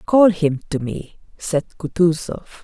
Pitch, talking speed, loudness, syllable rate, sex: 165 Hz, 135 wpm, -20 LUFS, 4.2 syllables/s, female